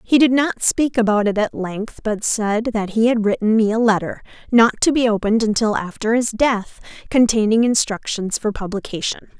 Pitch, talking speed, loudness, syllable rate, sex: 220 Hz, 185 wpm, -18 LUFS, 5.1 syllables/s, female